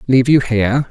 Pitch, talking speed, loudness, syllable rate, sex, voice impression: 125 Hz, 200 wpm, -14 LUFS, 6.7 syllables/s, male, very masculine, very adult-like, middle-aged, very thick, tensed, powerful, slightly dark, hard, slightly muffled, fluent, cool, intellectual, slightly refreshing, very sincere, very calm, mature, friendly, reassuring, slightly unique, slightly elegant, wild, slightly lively, kind, slightly modest